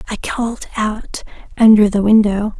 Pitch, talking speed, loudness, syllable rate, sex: 215 Hz, 140 wpm, -14 LUFS, 4.7 syllables/s, female